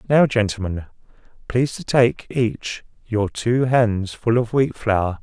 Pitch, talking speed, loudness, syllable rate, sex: 115 Hz, 150 wpm, -20 LUFS, 3.9 syllables/s, male